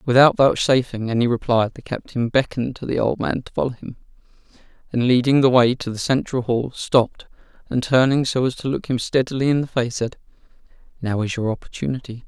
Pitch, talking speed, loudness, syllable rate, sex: 125 Hz, 190 wpm, -20 LUFS, 5.9 syllables/s, male